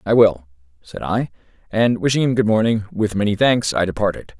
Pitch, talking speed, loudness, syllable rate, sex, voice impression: 105 Hz, 190 wpm, -18 LUFS, 5.5 syllables/s, male, masculine, adult-like, refreshing, sincere, elegant, slightly sweet